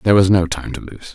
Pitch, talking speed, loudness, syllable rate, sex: 90 Hz, 315 wpm, -16 LUFS, 6.7 syllables/s, male